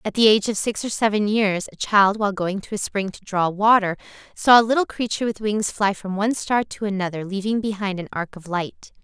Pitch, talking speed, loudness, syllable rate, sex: 205 Hz, 240 wpm, -21 LUFS, 5.7 syllables/s, female